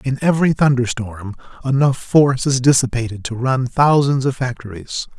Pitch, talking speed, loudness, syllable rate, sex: 130 Hz, 150 wpm, -17 LUFS, 5.0 syllables/s, male